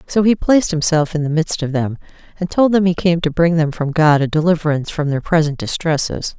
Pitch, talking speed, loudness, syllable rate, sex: 160 Hz, 235 wpm, -16 LUFS, 5.8 syllables/s, female